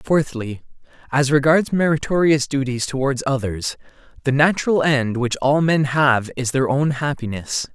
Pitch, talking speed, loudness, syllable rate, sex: 135 Hz, 140 wpm, -19 LUFS, 4.6 syllables/s, male